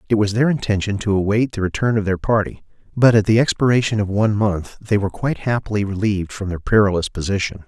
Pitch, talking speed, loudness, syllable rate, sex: 105 Hz, 210 wpm, -19 LUFS, 6.5 syllables/s, male